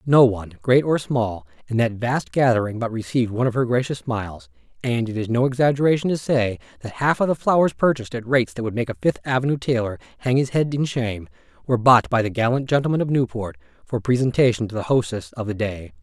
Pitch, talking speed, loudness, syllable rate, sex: 120 Hz, 220 wpm, -21 LUFS, 6.3 syllables/s, male